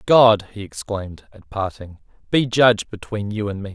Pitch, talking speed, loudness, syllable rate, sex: 105 Hz, 175 wpm, -20 LUFS, 4.9 syllables/s, male